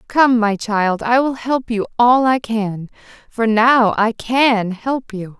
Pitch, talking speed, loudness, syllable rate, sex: 230 Hz, 180 wpm, -16 LUFS, 3.4 syllables/s, female